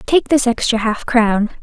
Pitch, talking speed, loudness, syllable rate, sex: 240 Hz, 185 wpm, -15 LUFS, 4.3 syllables/s, female